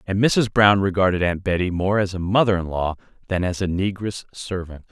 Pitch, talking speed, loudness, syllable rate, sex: 95 Hz, 205 wpm, -21 LUFS, 5.3 syllables/s, male